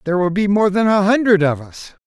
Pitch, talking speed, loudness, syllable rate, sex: 195 Hz, 260 wpm, -15 LUFS, 6.0 syllables/s, male